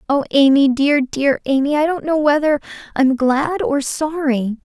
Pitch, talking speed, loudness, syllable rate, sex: 285 Hz, 180 wpm, -16 LUFS, 4.6 syllables/s, female